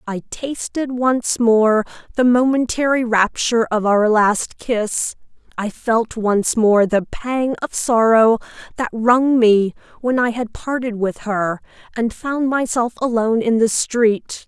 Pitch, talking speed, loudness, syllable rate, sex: 230 Hz, 145 wpm, -18 LUFS, 3.7 syllables/s, female